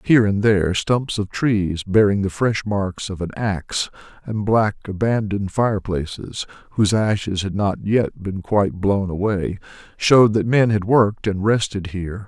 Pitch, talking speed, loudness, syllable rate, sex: 100 Hz, 170 wpm, -20 LUFS, 4.6 syllables/s, male